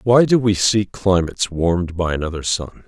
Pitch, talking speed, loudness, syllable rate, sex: 95 Hz, 190 wpm, -18 LUFS, 5.3 syllables/s, male